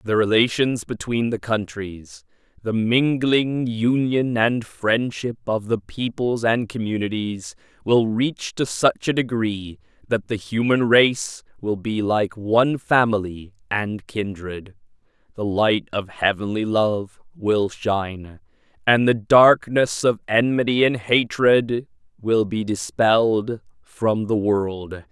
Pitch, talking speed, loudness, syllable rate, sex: 110 Hz, 120 wpm, -21 LUFS, 3.6 syllables/s, male